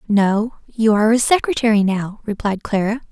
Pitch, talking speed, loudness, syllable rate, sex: 215 Hz, 155 wpm, -18 LUFS, 5.2 syllables/s, female